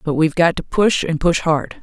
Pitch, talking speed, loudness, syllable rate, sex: 165 Hz, 265 wpm, -17 LUFS, 5.2 syllables/s, female